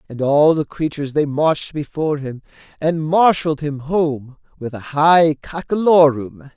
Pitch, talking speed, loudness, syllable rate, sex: 150 Hz, 145 wpm, -17 LUFS, 4.5 syllables/s, male